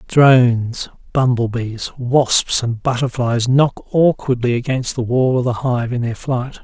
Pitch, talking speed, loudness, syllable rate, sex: 125 Hz, 145 wpm, -17 LUFS, 3.9 syllables/s, male